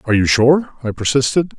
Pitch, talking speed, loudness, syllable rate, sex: 130 Hz, 190 wpm, -15 LUFS, 6.1 syllables/s, male